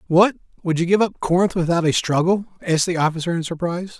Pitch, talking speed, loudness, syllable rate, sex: 175 Hz, 210 wpm, -20 LUFS, 6.7 syllables/s, male